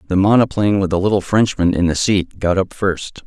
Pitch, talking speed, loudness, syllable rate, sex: 95 Hz, 220 wpm, -16 LUFS, 5.5 syllables/s, male